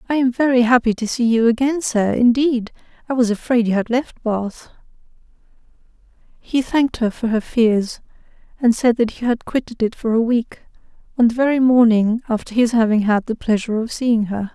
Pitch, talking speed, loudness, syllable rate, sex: 235 Hz, 190 wpm, -18 LUFS, 5.3 syllables/s, female